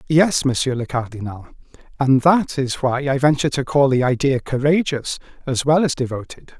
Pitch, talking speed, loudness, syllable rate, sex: 135 Hz, 175 wpm, -19 LUFS, 5.2 syllables/s, male